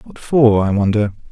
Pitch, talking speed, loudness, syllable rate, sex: 115 Hz, 180 wpm, -15 LUFS, 4.7 syllables/s, male